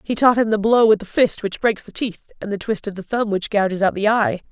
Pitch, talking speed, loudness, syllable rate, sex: 210 Hz, 305 wpm, -19 LUFS, 5.7 syllables/s, female